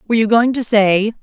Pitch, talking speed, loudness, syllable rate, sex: 220 Hz, 245 wpm, -14 LUFS, 5.6 syllables/s, female